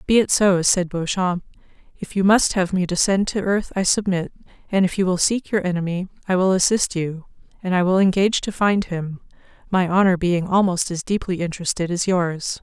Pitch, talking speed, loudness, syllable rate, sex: 185 Hz, 200 wpm, -20 LUFS, 5.3 syllables/s, female